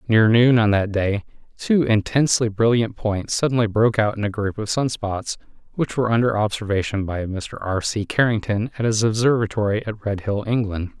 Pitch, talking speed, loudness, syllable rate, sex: 110 Hz, 180 wpm, -21 LUFS, 5.3 syllables/s, male